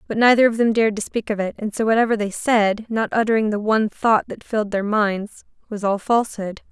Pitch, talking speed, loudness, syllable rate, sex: 215 Hz, 215 wpm, -20 LUFS, 5.9 syllables/s, female